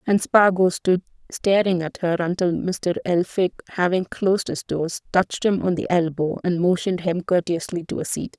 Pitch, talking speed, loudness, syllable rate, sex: 180 Hz, 180 wpm, -22 LUFS, 4.9 syllables/s, female